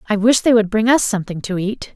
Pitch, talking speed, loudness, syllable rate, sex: 215 Hz, 275 wpm, -16 LUFS, 6.3 syllables/s, female